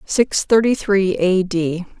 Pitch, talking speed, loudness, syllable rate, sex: 190 Hz, 150 wpm, -17 LUFS, 1.7 syllables/s, female